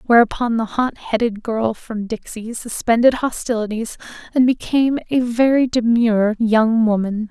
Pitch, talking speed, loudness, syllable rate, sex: 230 Hz, 130 wpm, -18 LUFS, 4.6 syllables/s, female